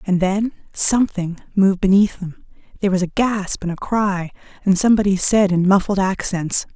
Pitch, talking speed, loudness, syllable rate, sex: 195 Hz, 140 wpm, -18 LUFS, 5.2 syllables/s, female